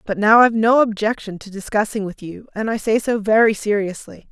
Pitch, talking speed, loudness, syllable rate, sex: 215 Hz, 210 wpm, -18 LUFS, 5.6 syllables/s, female